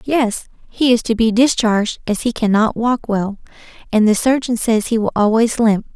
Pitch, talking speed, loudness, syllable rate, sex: 225 Hz, 200 wpm, -16 LUFS, 4.9 syllables/s, female